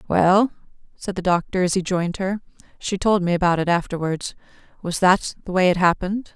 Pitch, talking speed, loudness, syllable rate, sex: 185 Hz, 170 wpm, -21 LUFS, 5.7 syllables/s, female